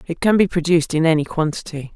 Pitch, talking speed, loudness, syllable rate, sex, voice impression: 165 Hz, 215 wpm, -18 LUFS, 6.6 syllables/s, female, feminine, adult-like, slightly tensed, soft, raspy, intellectual, calm, slightly friendly, reassuring, kind, slightly modest